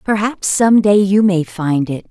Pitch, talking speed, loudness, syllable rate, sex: 190 Hz, 200 wpm, -14 LUFS, 4.0 syllables/s, female